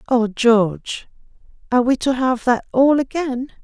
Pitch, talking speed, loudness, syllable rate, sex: 250 Hz, 150 wpm, -18 LUFS, 4.5 syllables/s, female